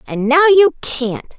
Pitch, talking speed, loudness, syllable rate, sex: 290 Hz, 175 wpm, -14 LUFS, 3.4 syllables/s, female